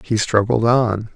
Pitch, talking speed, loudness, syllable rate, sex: 110 Hz, 155 wpm, -17 LUFS, 3.9 syllables/s, male